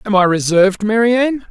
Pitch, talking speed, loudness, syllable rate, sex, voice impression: 210 Hz, 160 wpm, -14 LUFS, 5.8 syllables/s, female, feminine, middle-aged, thick, slightly relaxed, slightly powerful, soft, raspy, intellectual, calm, slightly friendly, kind, modest